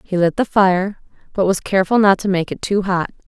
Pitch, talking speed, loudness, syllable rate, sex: 190 Hz, 235 wpm, -17 LUFS, 5.5 syllables/s, female